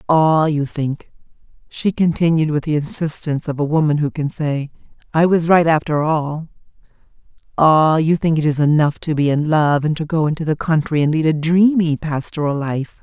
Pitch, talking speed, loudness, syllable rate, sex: 155 Hz, 190 wpm, -17 LUFS, 5.0 syllables/s, female